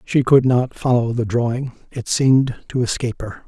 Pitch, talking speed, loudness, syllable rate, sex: 120 Hz, 190 wpm, -18 LUFS, 5.1 syllables/s, male